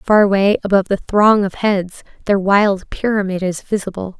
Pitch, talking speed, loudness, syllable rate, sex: 195 Hz, 170 wpm, -16 LUFS, 4.9 syllables/s, female